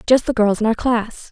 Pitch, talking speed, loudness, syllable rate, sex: 230 Hz, 275 wpm, -18 LUFS, 5.2 syllables/s, female